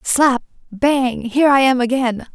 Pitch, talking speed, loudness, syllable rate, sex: 255 Hz, 155 wpm, -16 LUFS, 4.1 syllables/s, female